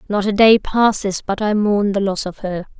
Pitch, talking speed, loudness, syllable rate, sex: 205 Hz, 235 wpm, -17 LUFS, 4.8 syllables/s, female